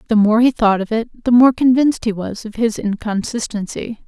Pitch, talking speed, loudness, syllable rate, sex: 225 Hz, 205 wpm, -16 LUFS, 5.2 syllables/s, female